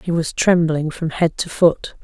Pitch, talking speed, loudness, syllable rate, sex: 165 Hz, 205 wpm, -18 LUFS, 4.1 syllables/s, female